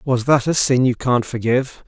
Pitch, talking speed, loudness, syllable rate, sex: 125 Hz, 225 wpm, -17 LUFS, 5.1 syllables/s, male